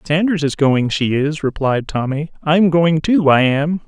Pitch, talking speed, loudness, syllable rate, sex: 150 Hz, 185 wpm, -16 LUFS, 4.1 syllables/s, male